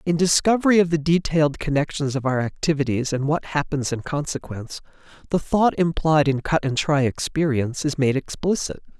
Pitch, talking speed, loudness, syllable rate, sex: 150 Hz, 165 wpm, -22 LUFS, 5.5 syllables/s, male